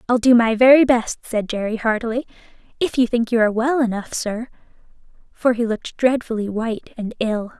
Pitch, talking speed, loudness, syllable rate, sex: 230 Hz, 180 wpm, -19 LUFS, 5.6 syllables/s, female